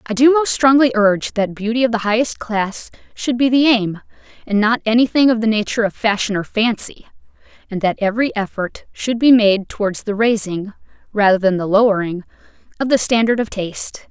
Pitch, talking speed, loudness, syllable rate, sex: 220 Hz, 185 wpm, -17 LUFS, 5.5 syllables/s, female